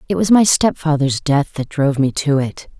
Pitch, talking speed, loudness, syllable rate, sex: 150 Hz, 215 wpm, -16 LUFS, 5.1 syllables/s, female